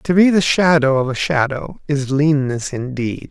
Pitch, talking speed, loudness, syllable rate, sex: 145 Hz, 180 wpm, -17 LUFS, 4.4 syllables/s, male